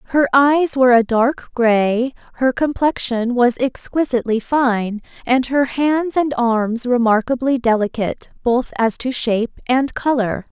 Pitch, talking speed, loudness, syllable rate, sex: 250 Hz, 135 wpm, -17 LUFS, 4.2 syllables/s, female